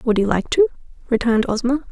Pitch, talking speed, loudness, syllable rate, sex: 250 Hz, 190 wpm, -19 LUFS, 6.5 syllables/s, female